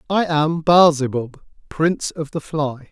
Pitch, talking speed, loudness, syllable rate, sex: 155 Hz, 165 wpm, -18 LUFS, 4.1 syllables/s, male